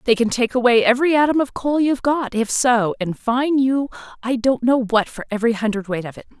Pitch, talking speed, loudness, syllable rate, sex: 245 Hz, 225 wpm, -19 LUFS, 5.8 syllables/s, female